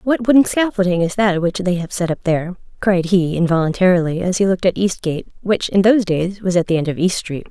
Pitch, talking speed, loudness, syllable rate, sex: 185 Hz, 250 wpm, -17 LUFS, 6.0 syllables/s, female